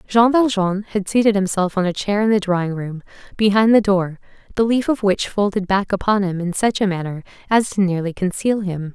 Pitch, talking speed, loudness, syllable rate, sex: 200 Hz, 215 wpm, -18 LUFS, 5.4 syllables/s, female